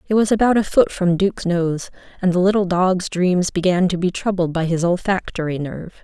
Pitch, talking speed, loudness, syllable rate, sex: 180 Hz, 210 wpm, -19 LUFS, 5.5 syllables/s, female